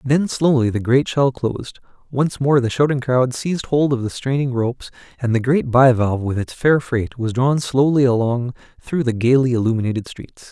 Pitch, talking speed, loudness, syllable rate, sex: 125 Hz, 195 wpm, -18 LUFS, 5.2 syllables/s, male